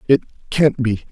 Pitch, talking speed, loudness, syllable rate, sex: 125 Hz, 160 wpm, -18 LUFS, 5.5 syllables/s, male